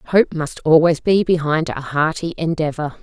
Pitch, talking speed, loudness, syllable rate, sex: 160 Hz, 160 wpm, -18 LUFS, 4.5 syllables/s, female